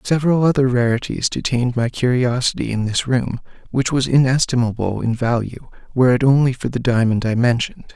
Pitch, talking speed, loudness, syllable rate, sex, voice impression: 125 Hz, 165 wpm, -18 LUFS, 5.8 syllables/s, male, very masculine, very middle-aged, thick, slightly tensed, slightly weak, slightly bright, slightly soft, slightly muffled, fluent, slightly raspy, cool, very intellectual, slightly refreshing, sincere, very calm, mature, friendly, reassuring, unique, slightly elegant, wild, sweet, lively, kind, modest